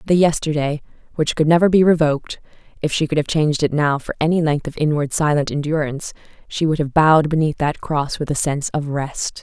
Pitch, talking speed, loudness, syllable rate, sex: 150 Hz, 205 wpm, -18 LUFS, 5.9 syllables/s, female